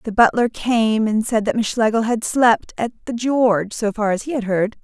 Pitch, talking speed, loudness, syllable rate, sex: 225 Hz, 235 wpm, -19 LUFS, 4.9 syllables/s, female